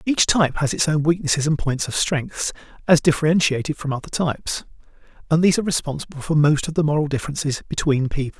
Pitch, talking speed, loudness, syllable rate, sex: 155 Hz, 195 wpm, -20 LUFS, 6.5 syllables/s, male